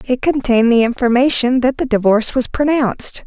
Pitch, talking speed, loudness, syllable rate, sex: 250 Hz, 165 wpm, -15 LUFS, 5.8 syllables/s, female